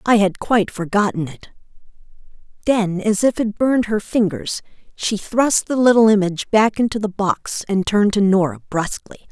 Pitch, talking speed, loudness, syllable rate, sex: 205 Hz, 165 wpm, -18 LUFS, 5.1 syllables/s, female